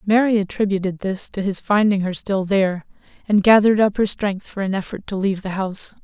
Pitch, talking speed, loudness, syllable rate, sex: 195 Hz, 210 wpm, -19 LUFS, 5.9 syllables/s, female